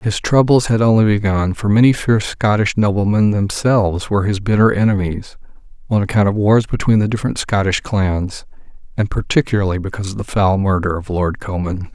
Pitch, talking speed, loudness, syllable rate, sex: 100 Hz, 170 wpm, -16 LUFS, 5.6 syllables/s, male